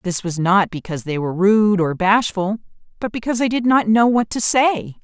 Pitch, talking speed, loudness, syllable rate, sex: 205 Hz, 215 wpm, -17 LUFS, 5.4 syllables/s, female